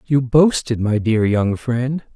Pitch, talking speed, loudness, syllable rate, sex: 125 Hz, 165 wpm, -17 LUFS, 3.6 syllables/s, male